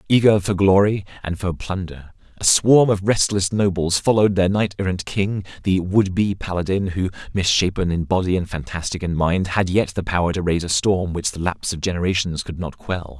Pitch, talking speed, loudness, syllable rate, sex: 95 Hz, 200 wpm, -20 LUFS, 5.4 syllables/s, male